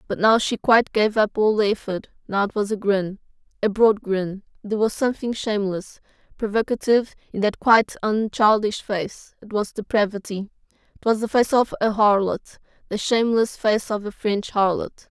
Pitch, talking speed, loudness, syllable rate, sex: 210 Hz, 170 wpm, -21 LUFS, 5.3 syllables/s, female